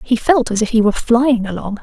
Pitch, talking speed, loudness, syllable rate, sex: 230 Hz, 265 wpm, -15 LUFS, 5.8 syllables/s, female